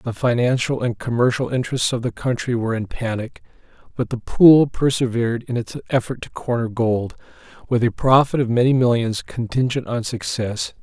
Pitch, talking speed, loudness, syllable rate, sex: 120 Hz, 165 wpm, -20 LUFS, 5.2 syllables/s, male